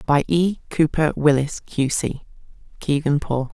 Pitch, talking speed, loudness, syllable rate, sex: 150 Hz, 135 wpm, -21 LUFS, 4.1 syllables/s, female